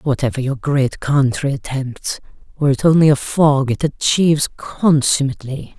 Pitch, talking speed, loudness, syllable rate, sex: 140 Hz, 115 wpm, -17 LUFS, 4.7 syllables/s, female